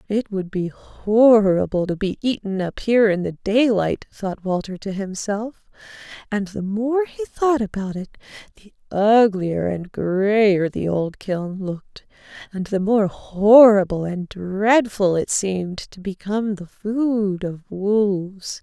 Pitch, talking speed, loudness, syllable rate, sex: 200 Hz, 145 wpm, -20 LUFS, 3.8 syllables/s, female